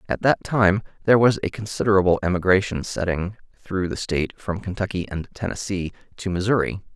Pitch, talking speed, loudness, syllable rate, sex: 95 Hz, 155 wpm, -22 LUFS, 5.8 syllables/s, male